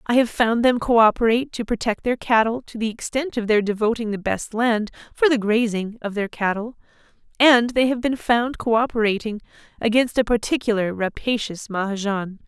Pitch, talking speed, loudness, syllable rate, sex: 225 Hz, 175 wpm, -21 LUFS, 5.3 syllables/s, female